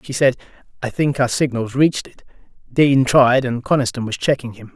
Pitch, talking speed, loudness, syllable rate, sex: 130 Hz, 190 wpm, -18 LUFS, 5.3 syllables/s, male